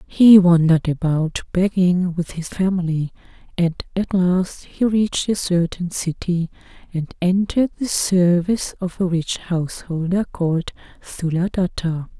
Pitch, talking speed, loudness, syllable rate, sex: 180 Hz, 125 wpm, -19 LUFS, 4.3 syllables/s, female